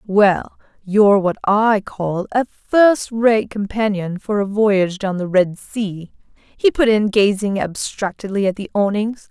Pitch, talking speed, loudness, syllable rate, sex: 205 Hz, 155 wpm, -18 LUFS, 3.9 syllables/s, female